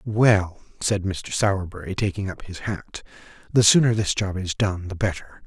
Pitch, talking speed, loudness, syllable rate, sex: 100 Hz, 175 wpm, -23 LUFS, 4.8 syllables/s, male